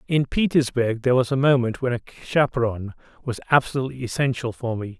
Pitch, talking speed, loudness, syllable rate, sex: 125 Hz, 170 wpm, -22 LUFS, 6.3 syllables/s, male